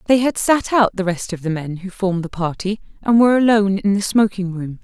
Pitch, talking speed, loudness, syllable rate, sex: 200 Hz, 250 wpm, -18 LUFS, 5.8 syllables/s, female